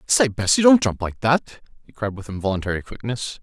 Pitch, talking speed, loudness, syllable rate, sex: 115 Hz, 210 wpm, -21 LUFS, 5.7 syllables/s, male